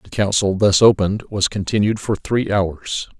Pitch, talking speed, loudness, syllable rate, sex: 100 Hz, 170 wpm, -18 LUFS, 4.8 syllables/s, male